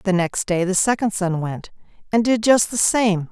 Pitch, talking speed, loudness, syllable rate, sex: 200 Hz, 215 wpm, -19 LUFS, 4.7 syllables/s, female